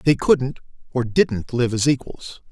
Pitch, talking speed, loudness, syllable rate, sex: 130 Hz, 165 wpm, -20 LUFS, 3.9 syllables/s, male